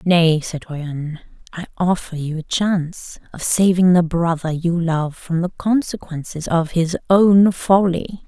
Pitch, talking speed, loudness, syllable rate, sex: 170 Hz, 145 wpm, -18 LUFS, 4.0 syllables/s, female